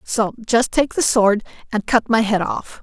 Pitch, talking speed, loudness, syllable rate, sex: 220 Hz, 210 wpm, -18 LUFS, 4.1 syllables/s, female